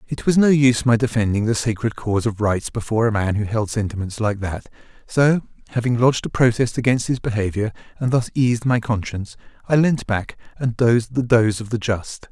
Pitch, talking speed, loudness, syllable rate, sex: 115 Hz, 205 wpm, -20 LUFS, 5.8 syllables/s, male